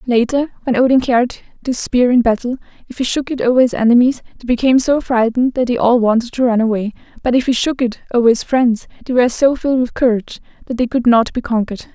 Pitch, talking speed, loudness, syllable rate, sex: 245 Hz, 230 wpm, -15 LUFS, 6.5 syllables/s, female